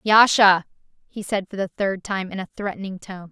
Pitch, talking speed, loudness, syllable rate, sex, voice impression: 195 Hz, 200 wpm, -21 LUFS, 5.1 syllables/s, female, feminine, slightly young, tensed, slightly bright, clear, fluent, slightly cute, intellectual, slightly friendly, elegant, slightly sharp